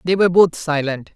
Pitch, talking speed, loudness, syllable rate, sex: 165 Hz, 205 wpm, -17 LUFS, 5.8 syllables/s, male